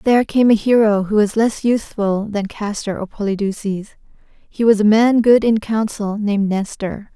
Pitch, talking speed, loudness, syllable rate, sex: 210 Hz, 175 wpm, -17 LUFS, 4.7 syllables/s, female